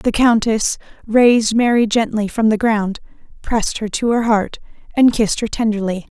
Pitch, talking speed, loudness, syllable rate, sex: 220 Hz, 165 wpm, -16 LUFS, 5.0 syllables/s, female